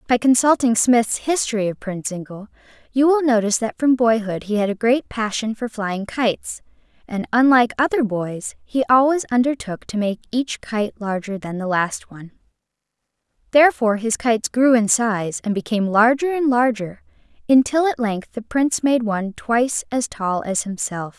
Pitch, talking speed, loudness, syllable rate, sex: 230 Hz, 170 wpm, -19 LUFS, 5.1 syllables/s, female